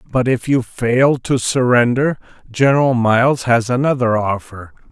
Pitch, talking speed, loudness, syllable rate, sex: 125 Hz, 135 wpm, -16 LUFS, 4.5 syllables/s, male